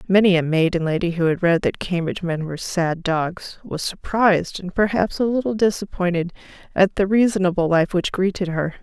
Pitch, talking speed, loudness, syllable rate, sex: 180 Hz, 185 wpm, -20 LUFS, 5.4 syllables/s, female